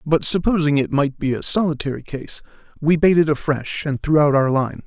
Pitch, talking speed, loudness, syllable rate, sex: 150 Hz, 195 wpm, -19 LUFS, 5.2 syllables/s, male